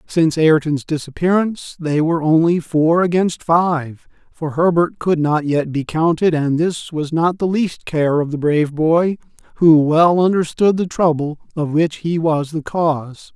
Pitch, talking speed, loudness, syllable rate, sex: 160 Hz, 170 wpm, -17 LUFS, 4.4 syllables/s, male